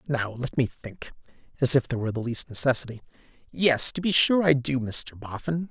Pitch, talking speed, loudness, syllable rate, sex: 130 Hz, 200 wpm, -23 LUFS, 3.5 syllables/s, male